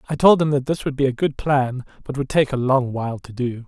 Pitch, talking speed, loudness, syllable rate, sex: 135 Hz, 295 wpm, -20 LUFS, 5.6 syllables/s, male